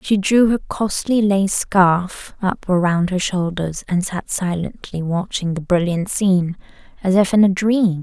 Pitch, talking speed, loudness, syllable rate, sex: 185 Hz, 165 wpm, -18 LUFS, 4.1 syllables/s, female